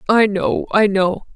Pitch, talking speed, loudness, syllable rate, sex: 200 Hz, 130 wpm, -17 LUFS, 3.8 syllables/s, female